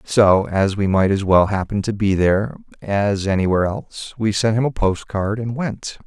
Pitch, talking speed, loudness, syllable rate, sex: 105 Hz, 200 wpm, -19 LUFS, 4.8 syllables/s, male